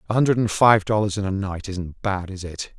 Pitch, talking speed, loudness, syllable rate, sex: 100 Hz, 260 wpm, -22 LUFS, 5.4 syllables/s, male